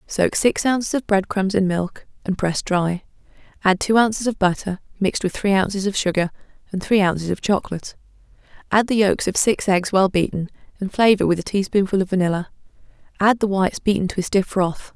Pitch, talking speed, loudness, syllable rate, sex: 195 Hz, 200 wpm, -20 LUFS, 5.8 syllables/s, female